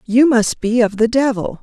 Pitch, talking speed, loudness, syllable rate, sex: 230 Hz, 220 wpm, -15 LUFS, 4.7 syllables/s, female